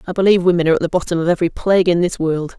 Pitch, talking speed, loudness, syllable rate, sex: 170 Hz, 300 wpm, -16 LUFS, 8.6 syllables/s, female